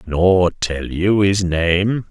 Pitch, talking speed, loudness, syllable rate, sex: 90 Hz, 140 wpm, -17 LUFS, 2.6 syllables/s, male